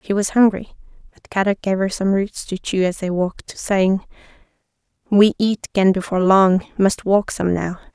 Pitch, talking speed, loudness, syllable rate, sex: 195 Hz, 180 wpm, -18 LUFS, 5.0 syllables/s, female